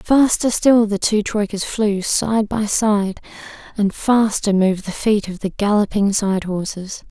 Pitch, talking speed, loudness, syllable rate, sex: 205 Hz, 160 wpm, -18 LUFS, 4.0 syllables/s, female